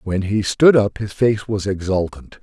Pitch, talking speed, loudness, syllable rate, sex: 100 Hz, 200 wpm, -18 LUFS, 4.3 syllables/s, male